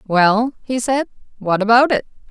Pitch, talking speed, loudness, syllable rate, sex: 225 Hz, 155 wpm, -17 LUFS, 4.4 syllables/s, female